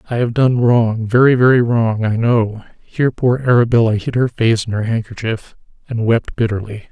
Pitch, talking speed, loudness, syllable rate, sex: 115 Hz, 175 wpm, -15 LUFS, 5.1 syllables/s, male